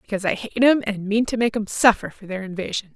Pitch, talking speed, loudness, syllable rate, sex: 215 Hz, 265 wpm, -21 LUFS, 6.2 syllables/s, female